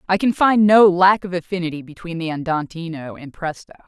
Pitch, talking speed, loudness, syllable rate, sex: 175 Hz, 185 wpm, -18 LUFS, 5.5 syllables/s, female